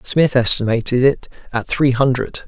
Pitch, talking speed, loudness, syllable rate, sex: 125 Hz, 145 wpm, -16 LUFS, 4.7 syllables/s, male